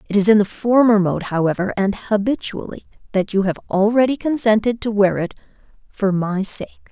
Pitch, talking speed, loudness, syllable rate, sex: 210 Hz, 175 wpm, -18 LUFS, 5.4 syllables/s, female